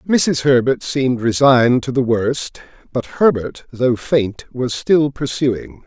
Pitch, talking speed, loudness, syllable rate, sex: 130 Hz, 145 wpm, -17 LUFS, 3.7 syllables/s, male